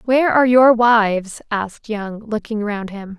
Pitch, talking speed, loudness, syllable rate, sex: 220 Hz, 170 wpm, -17 LUFS, 4.7 syllables/s, female